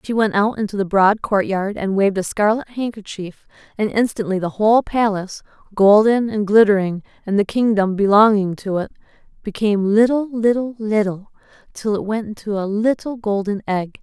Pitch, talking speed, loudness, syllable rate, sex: 210 Hz, 165 wpm, -18 LUFS, 5.2 syllables/s, female